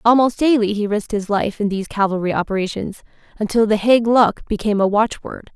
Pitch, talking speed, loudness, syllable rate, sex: 215 Hz, 175 wpm, -18 LUFS, 5.9 syllables/s, female